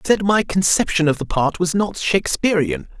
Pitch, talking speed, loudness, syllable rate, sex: 170 Hz, 180 wpm, -18 LUFS, 5.0 syllables/s, male